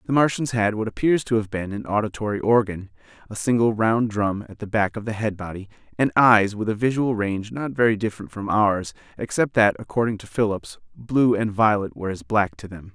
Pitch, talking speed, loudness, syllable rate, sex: 105 Hz, 215 wpm, -22 LUFS, 5.6 syllables/s, male